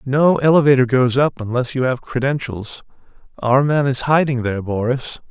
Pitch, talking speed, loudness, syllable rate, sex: 130 Hz, 160 wpm, -17 LUFS, 5.0 syllables/s, male